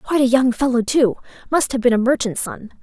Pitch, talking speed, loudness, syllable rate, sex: 250 Hz, 235 wpm, -18 LUFS, 5.8 syllables/s, female